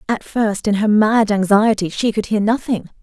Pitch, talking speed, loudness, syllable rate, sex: 215 Hz, 200 wpm, -17 LUFS, 4.7 syllables/s, female